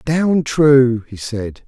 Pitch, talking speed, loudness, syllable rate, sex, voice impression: 135 Hz, 145 wpm, -15 LUFS, 2.6 syllables/s, male, very masculine, very adult-like, old, very thick, slightly relaxed, slightly weak, slightly bright, soft, clear, fluent, cool, very intellectual, very sincere, very calm, very mature, friendly, very reassuring, very unique, elegant, very wild, sweet, slightly lively, kind, slightly modest